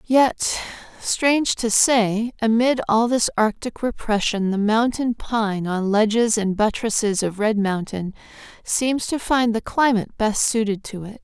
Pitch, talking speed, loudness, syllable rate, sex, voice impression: 220 Hz, 150 wpm, -20 LUFS, 4.1 syllables/s, female, very gender-neutral, slightly young, slightly adult-like, slightly relaxed, slightly weak, bright, soft, slightly clear, slightly fluent, cute, slightly cool, very intellectual, very refreshing, sincere, very calm, very friendly, very reassuring, slightly unique, elegant, sweet, slightly lively, very kind, slightly modest